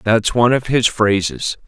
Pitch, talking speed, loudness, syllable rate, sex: 110 Hz, 180 wpm, -16 LUFS, 4.7 syllables/s, male